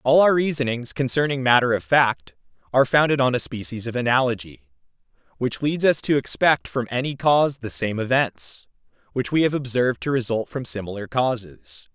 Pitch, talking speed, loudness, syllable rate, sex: 125 Hz, 170 wpm, -21 LUFS, 5.3 syllables/s, male